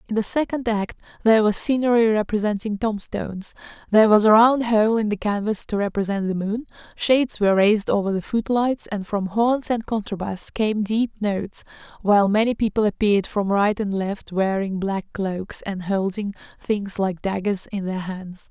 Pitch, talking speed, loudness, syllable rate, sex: 210 Hz, 175 wpm, -22 LUFS, 5.1 syllables/s, female